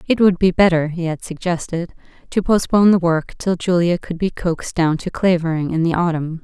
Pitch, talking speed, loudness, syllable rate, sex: 170 Hz, 205 wpm, -18 LUFS, 5.6 syllables/s, female